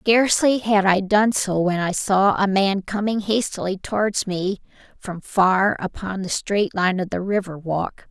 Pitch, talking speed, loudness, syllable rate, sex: 195 Hz, 180 wpm, -20 LUFS, 4.2 syllables/s, female